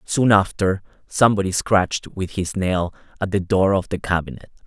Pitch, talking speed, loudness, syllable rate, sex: 95 Hz, 165 wpm, -20 LUFS, 5.1 syllables/s, male